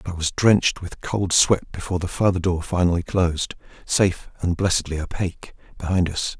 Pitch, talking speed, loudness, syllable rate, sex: 90 Hz, 180 wpm, -22 LUFS, 5.6 syllables/s, male